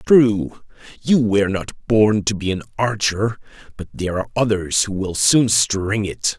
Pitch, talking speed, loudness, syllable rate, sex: 105 Hz, 170 wpm, -18 LUFS, 4.4 syllables/s, male